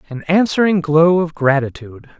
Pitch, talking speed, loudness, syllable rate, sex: 160 Hz, 135 wpm, -15 LUFS, 5.3 syllables/s, male